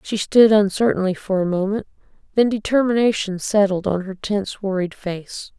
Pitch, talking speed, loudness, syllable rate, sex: 200 Hz, 150 wpm, -19 LUFS, 5.0 syllables/s, female